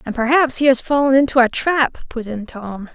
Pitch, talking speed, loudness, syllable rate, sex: 255 Hz, 225 wpm, -16 LUFS, 5.1 syllables/s, female